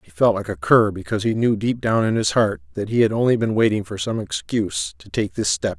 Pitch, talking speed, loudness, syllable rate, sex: 110 Hz, 270 wpm, -20 LUFS, 5.8 syllables/s, male